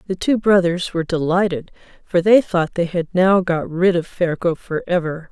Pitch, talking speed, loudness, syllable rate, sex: 180 Hz, 190 wpm, -18 LUFS, 4.8 syllables/s, female